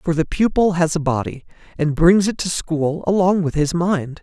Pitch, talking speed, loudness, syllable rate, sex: 170 Hz, 215 wpm, -18 LUFS, 4.8 syllables/s, male